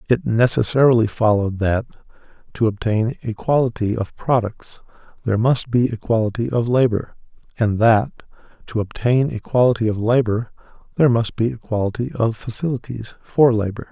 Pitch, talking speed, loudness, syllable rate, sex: 115 Hz, 130 wpm, -19 LUFS, 5.3 syllables/s, male